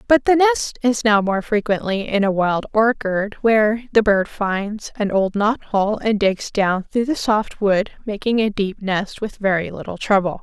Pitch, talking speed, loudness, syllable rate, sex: 210 Hz, 195 wpm, -19 LUFS, 4.3 syllables/s, female